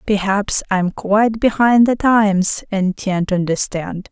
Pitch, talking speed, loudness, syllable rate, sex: 200 Hz, 145 wpm, -16 LUFS, 4.2 syllables/s, female